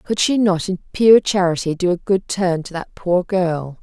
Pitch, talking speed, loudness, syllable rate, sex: 180 Hz, 220 wpm, -18 LUFS, 4.2 syllables/s, female